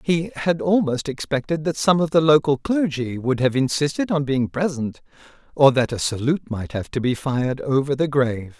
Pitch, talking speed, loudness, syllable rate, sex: 140 Hz, 195 wpm, -21 LUFS, 5.1 syllables/s, male